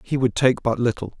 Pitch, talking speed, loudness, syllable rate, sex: 120 Hz, 250 wpm, -21 LUFS, 5.5 syllables/s, male